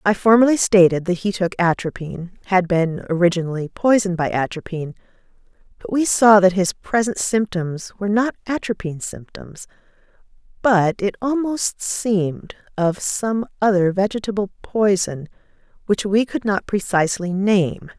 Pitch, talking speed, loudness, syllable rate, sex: 195 Hz, 125 wpm, -19 LUFS, 4.9 syllables/s, female